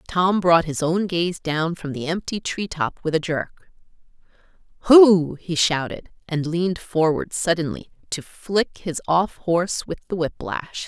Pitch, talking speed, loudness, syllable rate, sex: 170 Hz, 160 wpm, -21 LUFS, 4.1 syllables/s, female